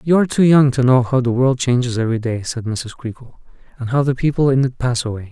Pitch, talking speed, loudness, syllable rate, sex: 125 Hz, 260 wpm, -17 LUFS, 6.2 syllables/s, male